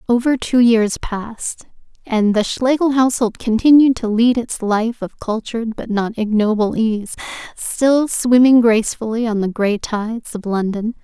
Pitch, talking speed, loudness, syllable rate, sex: 230 Hz, 150 wpm, -17 LUFS, 4.5 syllables/s, female